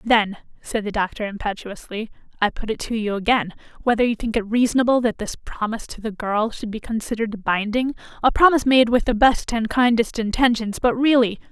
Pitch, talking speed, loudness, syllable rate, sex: 225 Hz, 195 wpm, -21 LUFS, 5.7 syllables/s, female